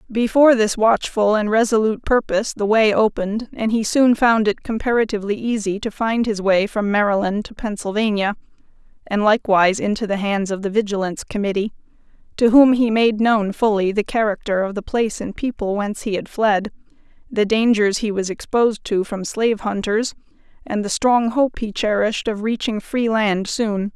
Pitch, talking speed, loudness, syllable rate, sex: 215 Hz, 175 wpm, -19 LUFS, 5.4 syllables/s, female